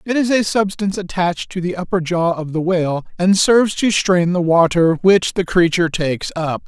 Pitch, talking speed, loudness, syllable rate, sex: 180 Hz, 205 wpm, -16 LUFS, 5.4 syllables/s, male